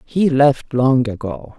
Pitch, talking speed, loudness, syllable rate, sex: 135 Hz, 150 wpm, -16 LUFS, 3.4 syllables/s, female